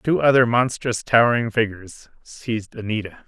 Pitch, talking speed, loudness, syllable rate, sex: 115 Hz, 130 wpm, -20 LUFS, 5.1 syllables/s, male